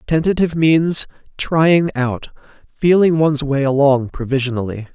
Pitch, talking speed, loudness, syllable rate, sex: 145 Hz, 110 wpm, -16 LUFS, 4.8 syllables/s, male